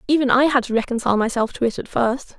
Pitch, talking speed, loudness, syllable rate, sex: 245 Hz, 250 wpm, -20 LUFS, 6.7 syllables/s, female